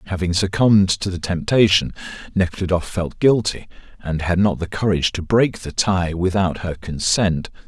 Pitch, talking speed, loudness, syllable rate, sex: 95 Hz, 155 wpm, -19 LUFS, 4.8 syllables/s, male